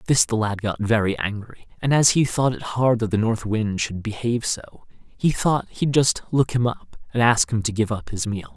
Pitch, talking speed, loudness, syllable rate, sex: 110 Hz, 245 wpm, -22 LUFS, 4.9 syllables/s, male